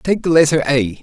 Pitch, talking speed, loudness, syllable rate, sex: 145 Hz, 235 wpm, -14 LUFS, 5.1 syllables/s, male